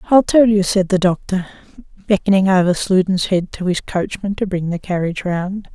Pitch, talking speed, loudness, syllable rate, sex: 190 Hz, 190 wpm, -17 LUFS, 5.3 syllables/s, female